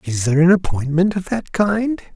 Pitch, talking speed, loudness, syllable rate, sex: 180 Hz, 195 wpm, -18 LUFS, 5.2 syllables/s, male